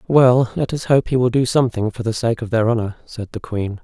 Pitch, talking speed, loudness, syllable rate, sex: 120 Hz, 265 wpm, -18 LUFS, 5.7 syllables/s, male